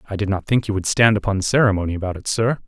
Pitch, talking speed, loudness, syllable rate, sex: 100 Hz, 270 wpm, -19 LUFS, 7.1 syllables/s, male